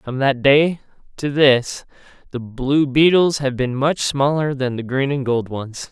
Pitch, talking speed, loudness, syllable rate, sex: 135 Hz, 180 wpm, -18 LUFS, 4.0 syllables/s, male